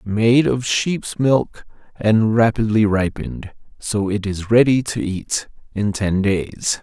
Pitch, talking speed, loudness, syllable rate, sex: 110 Hz, 140 wpm, -18 LUFS, 3.5 syllables/s, male